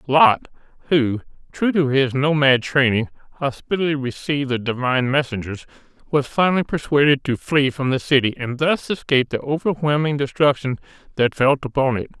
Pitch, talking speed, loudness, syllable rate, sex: 140 Hz, 150 wpm, -19 LUFS, 5.3 syllables/s, male